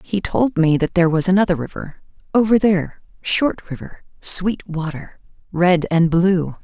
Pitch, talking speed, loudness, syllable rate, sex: 180 Hz, 145 wpm, -18 LUFS, 4.6 syllables/s, female